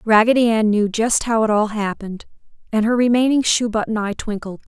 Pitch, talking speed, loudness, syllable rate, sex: 220 Hz, 190 wpm, -18 LUFS, 5.6 syllables/s, female